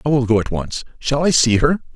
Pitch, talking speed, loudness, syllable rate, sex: 130 Hz, 245 wpm, -17 LUFS, 5.7 syllables/s, male